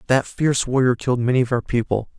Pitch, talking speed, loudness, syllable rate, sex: 125 Hz, 220 wpm, -20 LUFS, 6.7 syllables/s, male